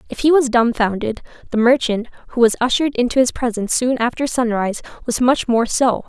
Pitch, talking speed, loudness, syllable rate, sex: 240 Hz, 190 wpm, -17 LUFS, 6.0 syllables/s, female